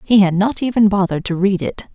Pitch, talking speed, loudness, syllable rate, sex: 200 Hz, 245 wpm, -16 LUFS, 6.1 syllables/s, female